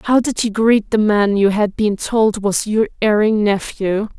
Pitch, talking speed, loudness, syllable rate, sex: 210 Hz, 200 wpm, -16 LUFS, 4.2 syllables/s, female